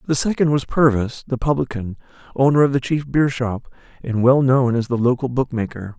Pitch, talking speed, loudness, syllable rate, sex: 125 Hz, 190 wpm, -19 LUFS, 5.4 syllables/s, male